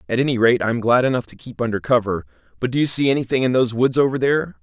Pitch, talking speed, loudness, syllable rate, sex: 120 Hz, 260 wpm, -19 LUFS, 7.1 syllables/s, male